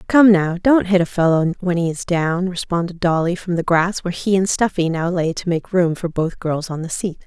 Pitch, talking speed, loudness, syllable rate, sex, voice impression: 175 Hz, 250 wpm, -18 LUFS, 5.2 syllables/s, female, feminine, adult-like, tensed, powerful, slightly hard, clear, fluent, intellectual, elegant, lively, sharp